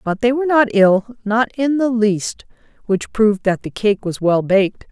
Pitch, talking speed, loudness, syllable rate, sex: 215 Hz, 185 wpm, -17 LUFS, 4.7 syllables/s, female